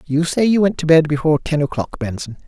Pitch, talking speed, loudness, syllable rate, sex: 155 Hz, 240 wpm, -17 LUFS, 6.2 syllables/s, male